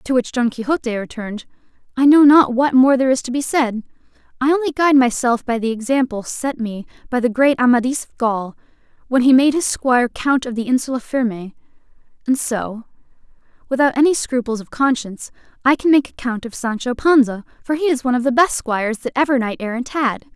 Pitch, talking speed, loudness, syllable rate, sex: 250 Hz, 200 wpm, -17 LUFS, 5.8 syllables/s, female